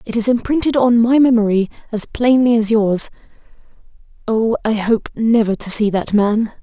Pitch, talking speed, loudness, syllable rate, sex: 225 Hz, 165 wpm, -15 LUFS, 4.8 syllables/s, female